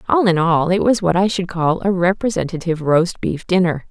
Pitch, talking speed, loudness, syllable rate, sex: 180 Hz, 215 wpm, -17 LUFS, 5.5 syllables/s, female